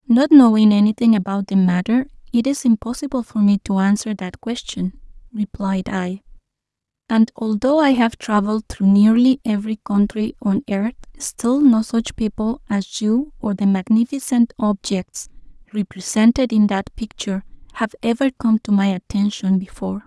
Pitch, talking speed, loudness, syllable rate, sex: 220 Hz, 145 wpm, -18 LUFS, 4.9 syllables/s, female